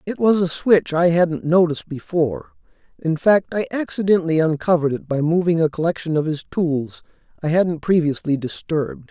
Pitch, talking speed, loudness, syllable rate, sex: 165 Hz, 160 wpm, -19 LUFS, 5.4 syllables/s, male